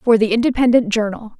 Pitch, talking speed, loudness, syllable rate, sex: 225 Hz, 170 wpm, -16 LUFS, 6.0 syllables/s, female